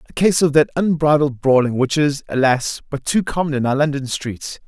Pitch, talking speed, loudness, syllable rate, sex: 145 Hz, 205 wpm, -18 LUFS, 5.2 syllables/s, male